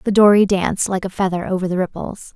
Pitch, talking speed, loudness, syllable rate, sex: 190 Hz, 230 wpm, -17 LUFS, 6.4 syllables/s, female